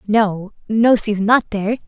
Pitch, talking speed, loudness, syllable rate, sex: 215 Hz, 160 wpm, -17 LUFS, 4.6 syllables/s, female